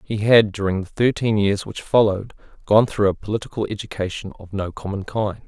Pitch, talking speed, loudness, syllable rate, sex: 100 Hz, 185 wpm, -21 LUFS, 5.7 syllables/s, male